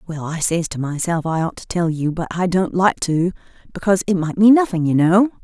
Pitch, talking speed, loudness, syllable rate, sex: 175 Hz, 245 wpm, -18 LUFS, 5.5 syllables/s, female